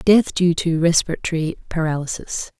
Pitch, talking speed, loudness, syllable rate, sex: 165 Hz, 115 wpm, -20 LUFS, 5.1 syllables/s, female